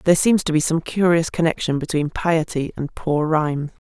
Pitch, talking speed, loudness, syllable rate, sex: 160 Hz, 185 wpm, -20 LUFS, 5.2 syllables/s, female